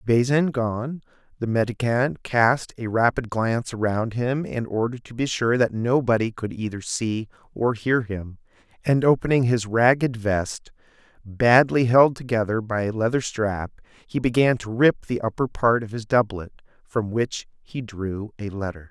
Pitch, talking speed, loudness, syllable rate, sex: 115 Hz, 160 wpm, -23 LUFS, 4.4 syllables/s, male